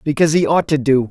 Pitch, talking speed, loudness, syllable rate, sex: 145 Hz, 270 wpm, -15 LUFS, 6.9 syllables/s, male